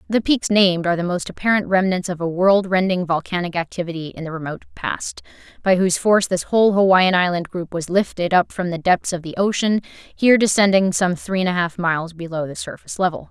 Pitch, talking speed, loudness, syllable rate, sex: 180 Hz, 210 wpm, -19 LUFS, 6.1 syllables/s, female